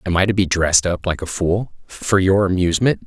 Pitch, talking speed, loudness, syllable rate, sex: 90 Hz, 235 wpm, -18 LUFS, 5.6 syllables/s, male